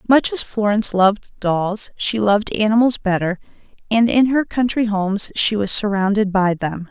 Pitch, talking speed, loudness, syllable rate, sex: 210 Hz, 165 wpm, -17 LUFS, 5.0 syllables/s, female